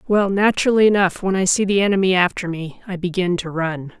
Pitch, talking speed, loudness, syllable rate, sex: 185 Hz, 210 wpm, -18 LUFS, 5.9 syllables/s, female